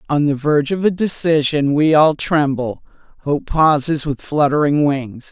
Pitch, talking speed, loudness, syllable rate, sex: 150 Hz, 160 wpm, -16 LUFS, 4.5 syllables/s, female